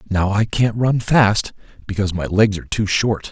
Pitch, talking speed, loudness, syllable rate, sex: 105 Hz, 200 wpm, -18 LUFS, 5.1 syllables/s, male